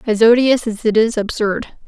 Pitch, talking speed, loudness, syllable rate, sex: 225 Hz, 190 wpm, -15 LUFS, 4.7 syllables/s, female